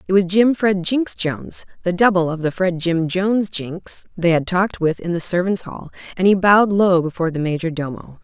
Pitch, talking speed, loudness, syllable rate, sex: 180 Hz, 180 wpm, -18 LUFS, 5.4 syllables/s, female